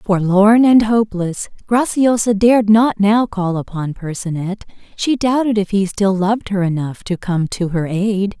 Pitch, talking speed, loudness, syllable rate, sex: 200 Hz, 165 wpm, -16 LUFS, 4.5 syllables/s, female